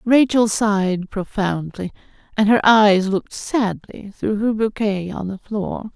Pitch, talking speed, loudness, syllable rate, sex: 205 Hz, 140 wpm, -19 LUFS, 4.0 syllables/s, female